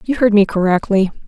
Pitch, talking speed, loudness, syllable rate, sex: 205 Hz, 190 wpm, -15 LUFS, 5.8 syllables/s, female